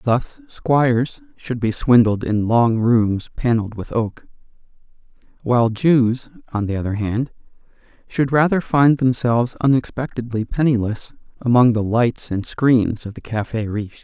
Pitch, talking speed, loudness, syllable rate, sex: 120 Hz, 135 wpm, -19 LUFS, 4.4 syllables/s, male